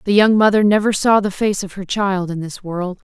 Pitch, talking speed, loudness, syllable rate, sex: 195 Hz, 250 wpm, -17 LUFS, 5.2 syllables/s, female